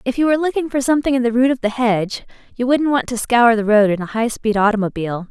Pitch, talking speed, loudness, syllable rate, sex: 240 Hz, 260 wpm, -17 LUFS, 6.8 syllables/s, female